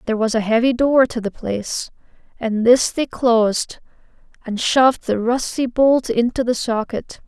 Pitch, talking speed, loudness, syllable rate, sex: 240 Hz, 165 wpm, -18 LUFS, 4.7 syllables/s, female